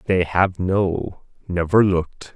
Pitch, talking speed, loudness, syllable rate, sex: 90 Hz, 130 wpm, -20 LUFS, 3.6 syllables/s, male